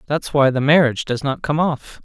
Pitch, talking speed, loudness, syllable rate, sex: 140 Hz, 235 wpm, -18 LUFS, 5.4 syllables/s, male